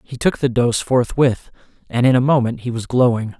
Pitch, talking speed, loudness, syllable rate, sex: 125 Hz, 210 wpm, -17 LUFS, 5.2 syllables/s, male